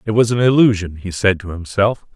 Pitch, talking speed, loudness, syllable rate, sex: 105 Hz, 220 wpm, -16 LUFS, 5.7 syllables/s, male